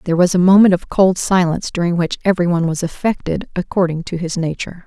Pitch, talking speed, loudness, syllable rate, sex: 175 Hz, 195 wpm, -16 LUFS, 6.5 syllables/s, female